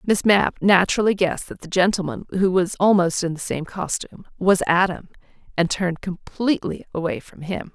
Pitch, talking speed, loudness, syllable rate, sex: 185 Hz, 170 wpm, -21 LUFS, 5.5 syllables/s, female